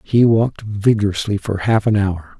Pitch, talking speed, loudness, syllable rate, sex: 100 Hz, 175 wpm, -17 LUFS, 4.9 syllables/s, male